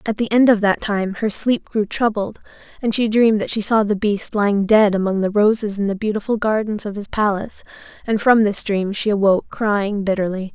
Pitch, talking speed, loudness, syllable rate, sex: 210 Hz, 215 wpm, -18 LUFS, 5.4 syllables/s, female